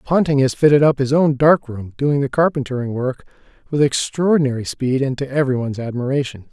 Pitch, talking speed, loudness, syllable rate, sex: 135 Hz, 165 wpm, -18 LUFS, 5.8 syllables/s, male